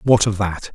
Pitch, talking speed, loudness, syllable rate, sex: 100 Hz, 240 wpm, -19 LUFS, 4.7 syllables/s, male